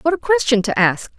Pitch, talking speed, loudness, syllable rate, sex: 220 Hz, 255 wpm, -17 LUFS, 5.8 syllables/s, female